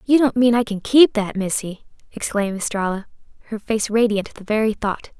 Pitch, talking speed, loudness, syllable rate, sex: 215 Hz, 195 wpm, -19 LUFS, 5.6 syllables/s, female